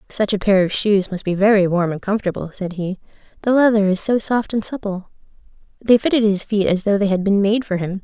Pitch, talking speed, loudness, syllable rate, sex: 200 Hz, 240 wpm, -18 LUFS, 5.8 syllables/s, female